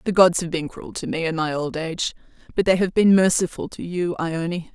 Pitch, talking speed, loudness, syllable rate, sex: 170 Hz, 240 wpm, -22 LUFS, 5.3 syllables/s, female